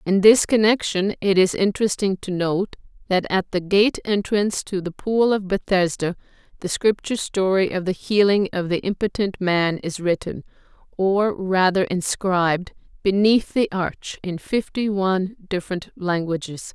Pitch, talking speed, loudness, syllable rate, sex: 190 Hz, 145 wpm, -21 LUFS, 4.6 syllables/s, female